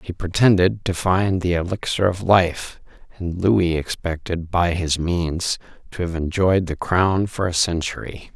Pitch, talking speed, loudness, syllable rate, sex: 90 Hz, 160 wpm, -20 LUFS, 4.1 syllables/s, male